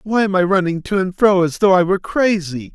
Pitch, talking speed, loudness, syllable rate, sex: 185 Hz, 260 wpm, -16 LUFS, 5.7 syllables/s, male